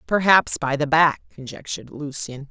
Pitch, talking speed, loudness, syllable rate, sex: 150 Hz, 145 wpm, -20 LUFS, 4.9 syllables/s, female